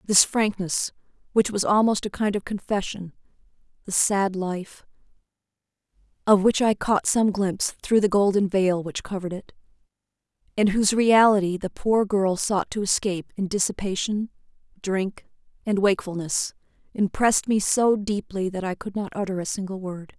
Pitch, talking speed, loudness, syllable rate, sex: 195 Hz, 150 wpm, -23 LUFS, 5.0 syllables/s, female